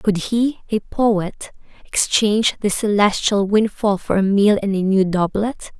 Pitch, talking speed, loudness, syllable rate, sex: 205 Hz, 155 wpm, -18 LUFS, 4.1 syllables/s, female